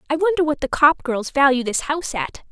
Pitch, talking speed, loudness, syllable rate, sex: 285 Hz, 240 wpm, -19 LUFS, 5.9 syllables/s, female